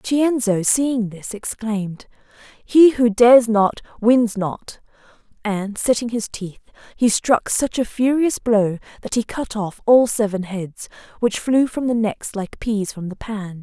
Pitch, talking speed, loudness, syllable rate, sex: 220 Hz, 165 wpm, -19 LUFS, 3.9 syllables/s, female